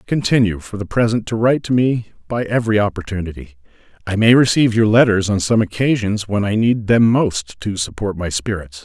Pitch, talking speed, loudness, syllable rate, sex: 105 Hz, 190 wpm, -17 LUFS, 5.6 syllables/s, male